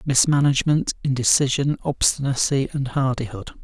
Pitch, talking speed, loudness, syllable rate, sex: 135 Hz, 85 wpm, -20 LUFS, 5.1 syllables/s, male